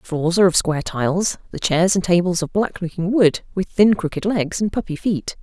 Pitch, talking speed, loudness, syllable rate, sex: 180 Hz, 230 wpm, -19 LUFS, 5.5 syllables/s, female